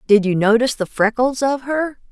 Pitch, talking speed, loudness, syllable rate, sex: 240 Hz, 200 wpm, -18 LUFS, 5.3 syllables/s, female